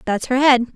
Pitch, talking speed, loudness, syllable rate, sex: 250 Hz, 240 wpm, -16 LUFS, 5.5 syllables/s, female